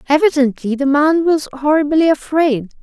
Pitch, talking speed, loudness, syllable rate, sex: 290 Hz, 125 wpm, -15 LUFS, 5.0 syllables/s, female